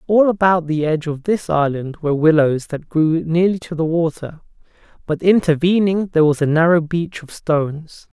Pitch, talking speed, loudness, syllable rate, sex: 165 Hz, 175 wpm, -17 LUFS, 5.1 syllables/s, male